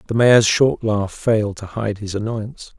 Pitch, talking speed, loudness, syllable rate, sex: 110 Hz, 195 wpm, -18 LUFS, 4.7 syllables/s, male